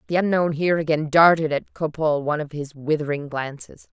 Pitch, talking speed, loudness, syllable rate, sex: 155 Hz, 180 wpm, -21 LUFS, 6.0 syllables/s, female